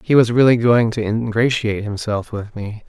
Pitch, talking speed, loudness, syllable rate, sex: 115 Hz, 190 wpm, -17 LUFS, 5.1 syllables/s, male